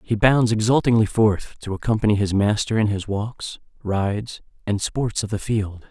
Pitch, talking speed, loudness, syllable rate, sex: 105 Hz, 175 wpm, -21 LUFS, 4.7 syllables/s, male